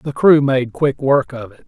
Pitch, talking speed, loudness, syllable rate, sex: 135 Hz, 250 wpm, -15 LUFS, 4.3 syllables/s, male